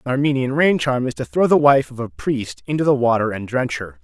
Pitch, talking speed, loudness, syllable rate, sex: 125 Hz, 270 wpm, -19 LUFS, 5.7 syllables/s, male